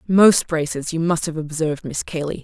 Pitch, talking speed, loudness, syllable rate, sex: 165 Hz, 195 wpm, -20 LUFS, 5.2 syllables/s, female